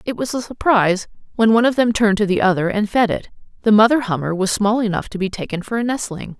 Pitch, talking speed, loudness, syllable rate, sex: 210 Hz, 245 wpm, -18 LUFS, 6.5 syllables/s, female